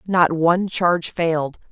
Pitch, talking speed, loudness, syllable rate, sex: 170 Hz, 140 wpm, -19 LUFS, 4.8 syllables/s, female